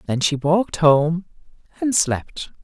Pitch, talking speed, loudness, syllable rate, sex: 165 Hz, 135 wpm, -19 LUFS, 3.8 syllables/s, male